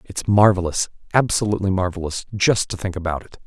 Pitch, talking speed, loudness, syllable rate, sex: 95 Hz, 140 wpm, -20 LUFS, 6.0 syllables/s, male